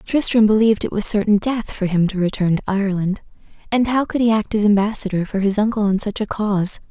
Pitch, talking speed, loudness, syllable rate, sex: 205 Hz, 225 wpm, -18 LUFS, 6.1 syllables/s, female